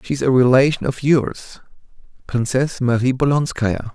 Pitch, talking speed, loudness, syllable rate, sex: 130 Hz, 135 wpm, -18 LUFS, 4.7 syllables/s, male